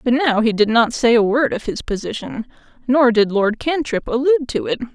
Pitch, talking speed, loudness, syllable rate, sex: 240 Hz, 220 wpm, -17 LUFS, 5.4 syllables/s, female